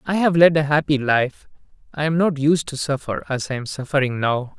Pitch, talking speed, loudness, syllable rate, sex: 145 Hz, 220 wpm, -20 LUFS, 5.3 syllables/s, male